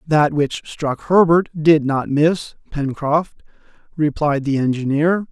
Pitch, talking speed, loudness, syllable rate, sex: 150 Hz, 125 wpm, -18 LUFS, 3.6 syllables/s, male